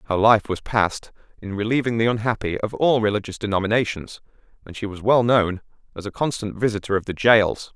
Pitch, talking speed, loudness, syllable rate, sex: 105 Hz, 185 wpm, -21 LUFS, 5.9 syllables/s, male